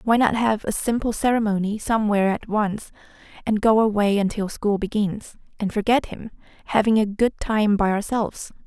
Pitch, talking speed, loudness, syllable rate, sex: 210 Hz, 165 wpm, -22 LUFS, 5.3 syllables/s, female